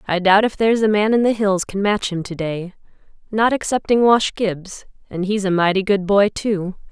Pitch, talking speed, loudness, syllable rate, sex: 200 Hz, 215 wpm, -18 LUFS, 5.0 syllables/s, female